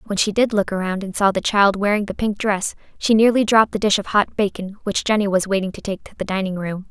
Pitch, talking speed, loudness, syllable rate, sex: 200 Hz, 270 wpm, -19 LUFS, 6.0 syllables/s, female